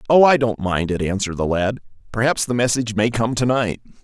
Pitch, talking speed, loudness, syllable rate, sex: 110 Hz, 225 wpm, -19 LUFS, 6.1 syllables/s, male